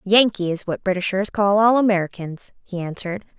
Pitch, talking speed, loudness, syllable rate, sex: 195 Hz, 160 wpm, -20 LUFS, 5.5 syllables/s, female